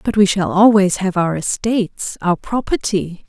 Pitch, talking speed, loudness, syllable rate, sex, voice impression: 190 Hz, 165 wpm, -17 LUFS, 4.5 syllables/s, female, feminine, adult-like, tensed, powerful, clear, intellectual, calm, reassuring, elegant, slightly sharp